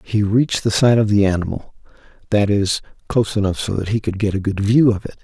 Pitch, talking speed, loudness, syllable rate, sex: 105 Hz, 240 wpm, -18 LUFS, 6.1 syllables/s, male